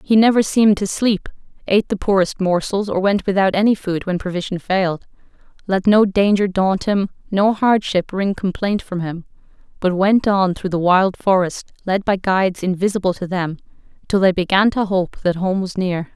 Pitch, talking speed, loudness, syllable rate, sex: 190 Hz, 185 wpm, -18 LUFS, 5.1 syllables/s, female